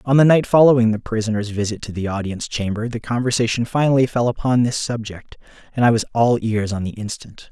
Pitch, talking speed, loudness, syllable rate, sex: 115 Hz, 210 wpm, -19 LUFS, 6.1 syllables/s, male